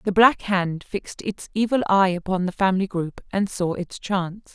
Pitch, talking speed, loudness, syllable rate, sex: 190 Hz, 200 wpm, -23 LUFS, 5.0 syllables/s, female